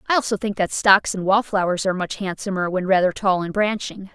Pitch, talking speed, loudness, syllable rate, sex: 195 Hz, 215 wpm, -20 LUFS, 5.8 syllables/s, female